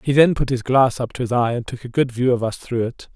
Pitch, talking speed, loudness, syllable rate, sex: 125 Hz, 340 wpm, -20 LUFS, 5.9 syllables/s, male